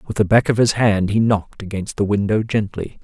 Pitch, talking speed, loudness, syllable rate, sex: 105 Hz, 235 wpm, -18 LUFS, 5.6 syllables/s, male